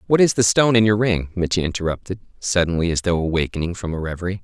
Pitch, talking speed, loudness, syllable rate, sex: 95 Hz, 215 wpm, -20 LUFS, 6.9 syllables/s, male